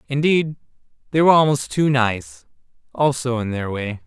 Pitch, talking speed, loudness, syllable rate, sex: 130 Hz, 135 wpm, -19 LUFS, 4.9 syllables/s, male